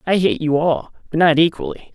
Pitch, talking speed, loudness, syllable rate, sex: 165 Hz, 215 wpm, -17 LUFS, 5.5 syllables/s, male